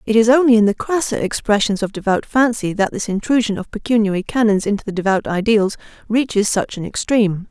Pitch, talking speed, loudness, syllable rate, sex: 215 Hz, 190 wpm, -17 LUFS, 5.9 syllables/s, female